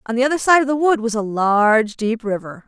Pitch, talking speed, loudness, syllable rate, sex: 235 Hz, 270 wpm, -17 LUFS, 5.9 syllables/s, female